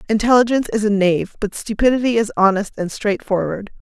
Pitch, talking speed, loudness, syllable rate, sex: 215 Hz, 150 wpm, -18 LUFS, 6.2 syllables/s, female